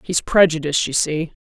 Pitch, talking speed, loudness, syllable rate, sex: 160 Hz, 170 wpm, -18 LUFS, 5.6 syllables/s, female